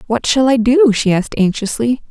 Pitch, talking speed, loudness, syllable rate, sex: 240 Hz, 200 wpm, -14 LUFS, 5.3 syllables/s, female